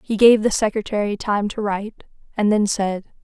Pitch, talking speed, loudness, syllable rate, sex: 210 Hz, 185 wpm, -19 LUFS, 5.2 syllables/s, female